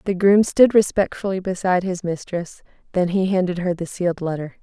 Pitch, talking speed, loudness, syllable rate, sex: 185 Hz, 180 wpm, -20 LUFS, 5.6 syllables/s, female